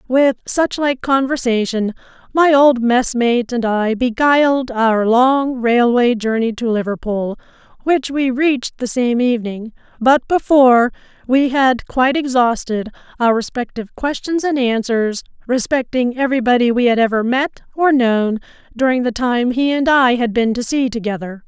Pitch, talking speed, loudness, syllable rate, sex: 245 Hz, 145 wpm, -16 LUFS, 4.6 syllables/s, female